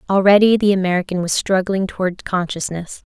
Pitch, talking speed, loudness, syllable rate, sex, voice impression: 190 Hz, 135 wpm, -17 LUFS, 5.6 syllables/s, female, feminine, adult-like, clear, slightly calm, friendly, slightly unique